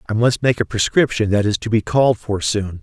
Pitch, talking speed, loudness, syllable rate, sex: 110 Hz, 255 wpm, -18 LUFS, 5.5 syllables/s, male